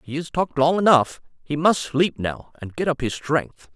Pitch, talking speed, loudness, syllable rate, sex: 150 Hz, 225 wpm, -21 LUFS, 4.8 syllables/s, male